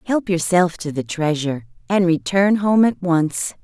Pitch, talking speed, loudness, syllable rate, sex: 175 Hz, 165 wpm, -19 LUFS, 4.4 syllables/s, female